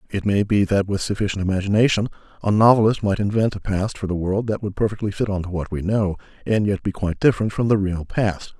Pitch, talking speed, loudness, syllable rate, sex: 100 Hz, 235 wpm, -21 LUFS, 6.2 syllables/s, male